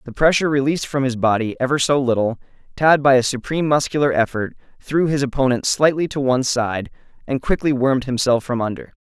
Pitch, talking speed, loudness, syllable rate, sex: 130 Hz, 185 wpm, -19 LUFS, 6.1 syllables/s, male